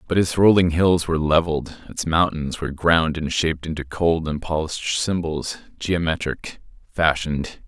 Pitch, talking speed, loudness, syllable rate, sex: 80 Hz, 140 wpm, -21 LUFS, 4.9 syllables/s, male